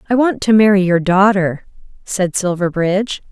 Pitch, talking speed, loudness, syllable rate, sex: 195 Hz, 145 wpm, -14 LUFS, 4.9 syllables/s, female